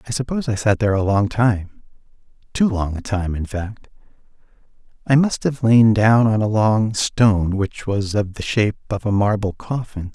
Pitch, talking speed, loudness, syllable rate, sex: 105 Hz, 185 wpm, -19 LUFS, 4.9 syllables/s, male